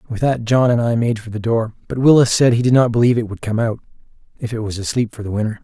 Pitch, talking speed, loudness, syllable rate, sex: 115 Hz, 285 wpm, -17 LUFS, 6.7 syllables/s, male